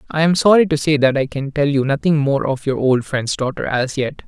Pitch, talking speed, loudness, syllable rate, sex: 145 Hz, 265 wpm, -17 LUFS, 5.4 syllables/s, male